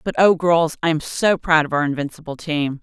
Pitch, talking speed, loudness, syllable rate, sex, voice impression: 160 Hz, 235 wpm, -19 LUFS, 5.3 syllables/s, female, feminine, adult-like, tensed, powerful, slightly hard, clear, fluent, intellectual, slightly unique, lively, slightly strict, sharp